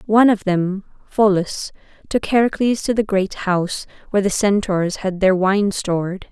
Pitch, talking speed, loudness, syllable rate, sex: 195 Hz, 160 wpm, -19 LUFS, 4.7 syllables/s, female